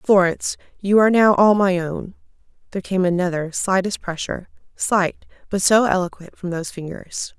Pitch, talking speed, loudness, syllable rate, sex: 190 Hz, 155 wpm, -19 LUFS, 5.3 syllables/s, female